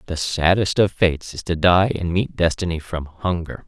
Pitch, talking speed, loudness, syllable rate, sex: 90 Hz, 195 wpm, -20 LUFS, 4.9 syllables/s, male